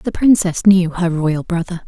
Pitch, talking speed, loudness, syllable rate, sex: 180 Hz, 190 wpm, -15 LUFS, 4.4 syllables/s, female